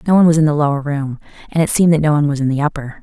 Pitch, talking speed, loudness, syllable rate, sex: 150 Hz, 340 wpm, -15 LUFS, 8.5 syllables/s, female